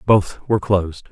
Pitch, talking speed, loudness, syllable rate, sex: 100 Hz, 160 wpm, -19 LUFS, 5.4 syllables/s, male